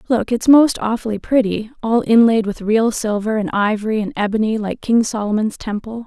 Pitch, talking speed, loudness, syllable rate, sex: 220 Hz, 180 wpm, -17 LUFS, 5.3 syllables/s, female